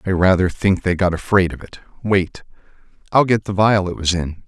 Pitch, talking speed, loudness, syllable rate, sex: 95 Hz, 215 wpm, -18 LUFS, 5.2 syllables/s, male